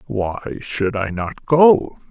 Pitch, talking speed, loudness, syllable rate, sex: 120 Hz, 145 wpm, -18 LUFS, 3.0 syllables/s, male